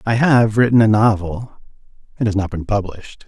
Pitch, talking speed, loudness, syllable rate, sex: 110 Hz, 185 wpm, -16 LUFS, 5.7 syllables/s, male